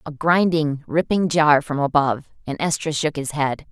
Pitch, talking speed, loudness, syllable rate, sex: 150 Hz, 180 wpm, -20 LUFS, 4.8 syllables/s, female